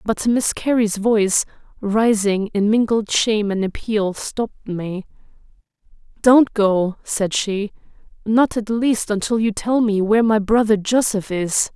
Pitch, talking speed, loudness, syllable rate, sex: 215 Hz, 145 wpm, -18 LUFS, 4.1 syllables/s, female